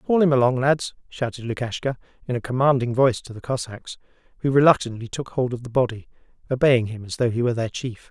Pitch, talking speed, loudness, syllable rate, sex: 125 Hz, 205 wpm, -22 LUFS, 6.2 syllables/s, male